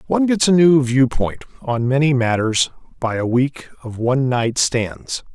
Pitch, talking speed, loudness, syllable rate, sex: 130 Hz, 170 wpm, -18 LUFS, 4.4 syllables/s, male